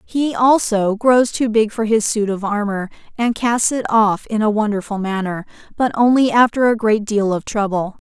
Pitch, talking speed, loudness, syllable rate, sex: 220 Hz, 195 wpm, -17 LUFS, 4.7 syllables/s, female